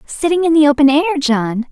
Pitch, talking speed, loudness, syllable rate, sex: 290 Hz, 210 wpm, -13 LUFS, 5.8 syllables/s, female